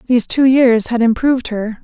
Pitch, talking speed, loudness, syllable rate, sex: 240 Hz, 195 wpm, -14 LUFS, 5.5 syllables/s, female